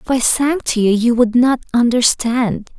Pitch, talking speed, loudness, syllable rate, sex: 240 Hz, 195 wpm, -15 LUFS, 4.6 syllables/s, female